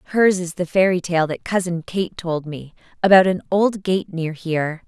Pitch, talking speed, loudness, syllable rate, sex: 175 Hz, 195 wpm, -20 LUFS, 4.8 syllables/s, female